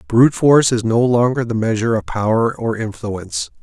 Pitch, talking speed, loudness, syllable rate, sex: 115 Hz, 180 wpm, -17 LUFS, 5.6 syllables/s, male